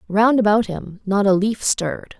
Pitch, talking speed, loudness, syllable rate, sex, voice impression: 205 Hz, 190 wpm, -18 LUFS, 4.6 syllables/s, female, feminine, slightly young, tensed, bright, slightly soft, clear, slightly cute, calm, friendly, reassuring, kind, slightly modest